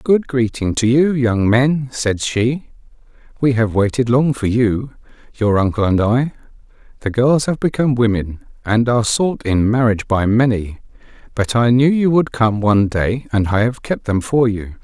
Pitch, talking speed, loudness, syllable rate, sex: 120 Hz, 180 wpm, -16 LUFS, 4.6 syllables/s, male